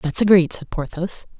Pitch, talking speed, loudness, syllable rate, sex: 170 Hz, 170 wpm, -19 LUFS, 4.8 syllables/s, female